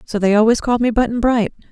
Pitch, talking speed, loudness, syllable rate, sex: 225 Hz, 245 wpm, -16 LUFS, 6.3 syllables/s, female